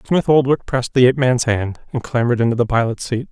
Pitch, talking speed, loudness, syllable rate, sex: 125 Hz, 235 wpm, -17 LUFS, 6.6 syllables/s, male